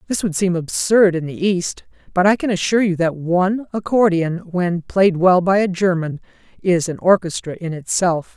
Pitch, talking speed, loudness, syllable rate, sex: 180 Hz, 185 wpm, -18 LUFS, 4.9 syllables/s, female